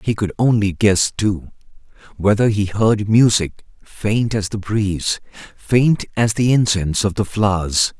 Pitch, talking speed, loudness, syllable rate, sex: 105 Hz, 150 wpm, -17 LUFS, 4.1 syllables/s, male